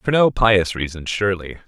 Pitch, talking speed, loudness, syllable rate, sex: 100 Hz, 180 wpm, -19 LUFS, 5.2 syllables/s, male